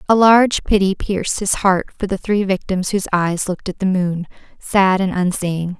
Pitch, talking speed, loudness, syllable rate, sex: 190 Hz, 195 wpm, -17 LUFS, 5.0 syllables/s, female